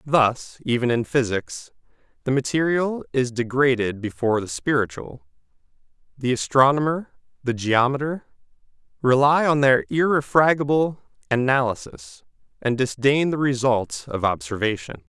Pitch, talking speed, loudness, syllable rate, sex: 130 Hz, 105 wpm, -21 LUFS, 4.6 syllables/s, male